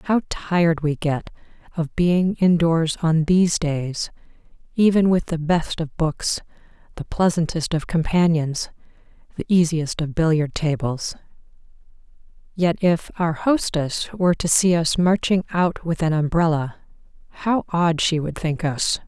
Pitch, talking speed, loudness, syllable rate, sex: 165 Hz, 140 wpm, -21 LUFS, 4.3 syllables/s, female